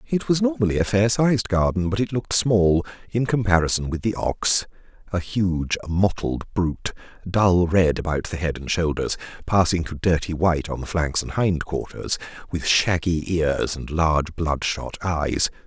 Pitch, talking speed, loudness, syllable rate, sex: 90 Hz, 170 wpm, -22 LUFS, 4.6 syllables/s, male